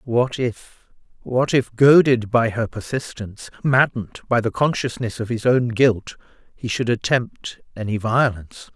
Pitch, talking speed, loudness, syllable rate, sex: 115 Hz, 135 wpm, -20 LUFS, 4.4 syllables/s, male